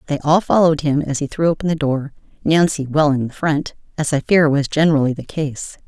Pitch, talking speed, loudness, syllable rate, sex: 150 Hz, 225 wpm, -18 LUFS, 5.7 syllables/s, female